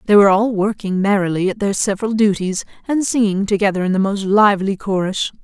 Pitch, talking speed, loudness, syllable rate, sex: 200 Hz, 190 wpm, -17 LUFS, 6.0 syllables/s, female